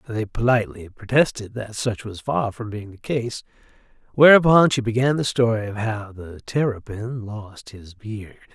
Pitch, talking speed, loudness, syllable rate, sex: 115 Hz, 160 wpm, -21 LUFS, 4.6 syllables/s, male